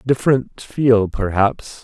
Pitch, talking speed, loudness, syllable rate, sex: 115 Hz, 100 wpm, -17 LUFS, 3.5 syllables/s, male